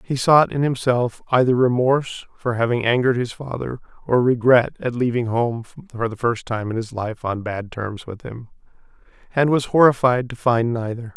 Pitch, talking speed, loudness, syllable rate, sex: 120 Hz, 185 wpm, -20 LUFS, 4.9 syllables/s, male